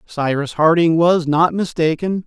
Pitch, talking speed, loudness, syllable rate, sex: 165 Hz, 135 wpm, -16 LUFS, 4.2 syllables/s, male